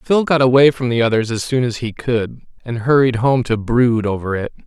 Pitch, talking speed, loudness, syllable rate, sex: 120 Hz, 230 wpm, -16 LUFS, 5.1 syllables/s, male